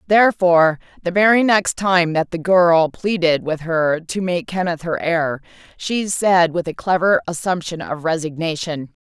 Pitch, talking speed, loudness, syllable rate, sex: 175 Hz, 160 wpm, -18 LUFS, 4.5 syllables/s, female